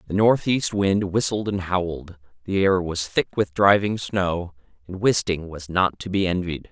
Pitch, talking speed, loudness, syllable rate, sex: 95 Hz, 180 wpm, -22 LUFS, 4.4 syllables/s, male